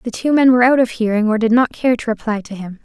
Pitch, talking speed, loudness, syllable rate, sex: 230 Hz, 315 wpm, -15 LUFS, 6.6 syllables/s, female